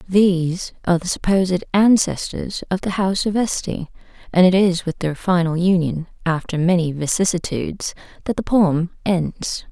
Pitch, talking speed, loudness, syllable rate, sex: 180 Hz, 150 wpm, -19 LUFS, 4.7 syllables/s, female